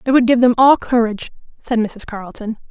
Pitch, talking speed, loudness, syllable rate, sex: 235 Hz, 200 wpm, -15 LUFS, 6.0 syllables/s, female